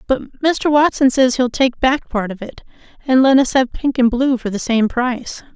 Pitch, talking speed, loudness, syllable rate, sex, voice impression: 255 Hz, 225 wpm, -16 LUFS, 4.9 syllables/s, female, feminine, slightly middle-aged, slightly intellectual, slightly unique